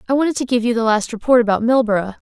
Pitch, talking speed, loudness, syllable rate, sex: 235 Hz, 265 wpm, -17 LUFS, 7.0 syllables/s, female